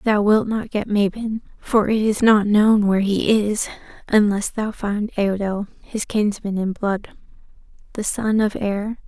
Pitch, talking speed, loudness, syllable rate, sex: 210 Hz, 165 wpm, -20 LUFS, 4.1 syllables/s, female